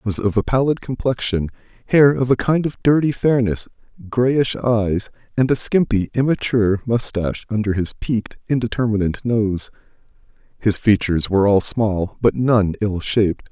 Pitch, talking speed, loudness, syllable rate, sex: 115 Hz, 150 wpm, -19 LUFS, 5.1 syllables/s, male